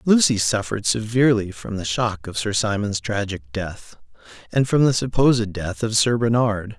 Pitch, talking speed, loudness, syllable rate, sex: 110 Hz, 170 wpm, -21 LUFS, 5.0 syllables/s, male